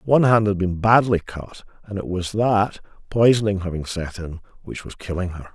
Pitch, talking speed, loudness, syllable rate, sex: 100 Hz, 195 wpm, -21 LUFS, 5.1 syllables/s, male